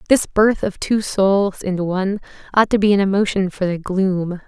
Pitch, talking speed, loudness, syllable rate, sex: 195 Hz, 200 wpm, -18 LUFS, 4.9 syllables/s, female